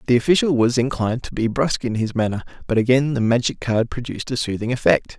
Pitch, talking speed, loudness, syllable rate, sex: 120 Hz, 220 wpm, -20 LUFS, 6.5 syllables/s, male